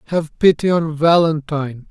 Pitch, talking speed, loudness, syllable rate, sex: 155 Hz, 125 wpm, -16 LUFS, 5.0 syllables/s, male